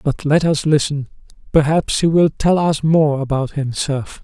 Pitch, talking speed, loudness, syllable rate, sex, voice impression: 150 Hz, 170 wpm, -17 LUFS, 4.4 syllables/s, male, masculine, middle-aged, slightly powerful, slightly halting, intellectual, calm, mature, wild, lively, strict, sharp